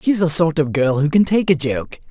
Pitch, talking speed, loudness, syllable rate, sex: 160 Hz, 285 wpm, -17 LUFS, 5.0 syllables/s, male